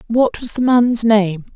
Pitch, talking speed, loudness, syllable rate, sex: 225 Hz, 195 wpm, -15 LUFS, 3.9 syllables/s, female